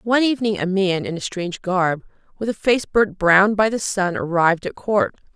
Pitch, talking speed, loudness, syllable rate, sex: 195 Hz, 215 wpm, -19 LUFS, 5.3 syllables/s, female